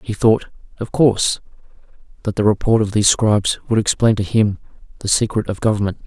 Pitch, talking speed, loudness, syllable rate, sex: 105 Hz, 180 wpm, -17 LUFS, 5.9 syllables/s, male